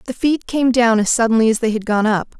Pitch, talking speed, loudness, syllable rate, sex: 230 Hz, 275 wpm, -16 LUFS, 5.9 syllables/s, female